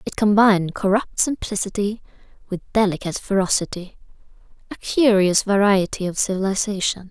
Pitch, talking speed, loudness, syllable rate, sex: 200 Hz, 95 wpm, -20 LUFS, 5.3 syllables/s, female